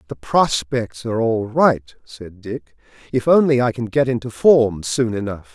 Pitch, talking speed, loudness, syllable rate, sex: 115 Hz, 175 wpm, -18 LUFS, 4.3 syllables/s, male